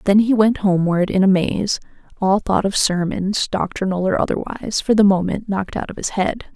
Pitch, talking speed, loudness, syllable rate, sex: 195 Hz, 200 wpm, -18 LUFS, 5.4 syllables/s, female